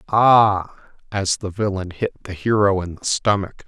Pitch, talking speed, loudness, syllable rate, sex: 100 Hz, 165 wpm, -19 LUFS, 4.3 syllables/s, male